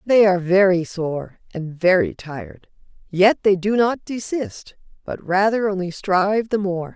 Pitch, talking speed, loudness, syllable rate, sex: 190 Hz, 155 wpm, -19 LUFS, 4.3 syllables/s, female